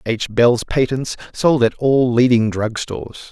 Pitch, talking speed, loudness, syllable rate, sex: 120 Hz, 165 wpm, -17 LUFS, 4.2 syllables/s, male